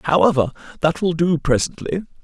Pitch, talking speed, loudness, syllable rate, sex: 155 Hz, 110 wpm, -19 LUFS, 4.7 syllables/s, male